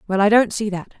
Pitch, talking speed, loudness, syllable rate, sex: 205 Hz, 300 wpm, -18 LUFS, 6.4 syllables/s, female